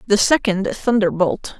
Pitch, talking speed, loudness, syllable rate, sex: 205 Hz, 115 wpm, -18 LUFS, 4.3 syllables/s, female